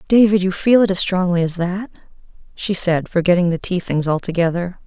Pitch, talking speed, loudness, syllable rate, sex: 185 Hz, 185 wpm, -18 LUFS, 5.5 syllables/s, female